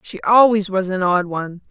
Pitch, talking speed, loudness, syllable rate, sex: 195 Hz, 210 wpm, -17 LUFS, 5.4 syllables/s, female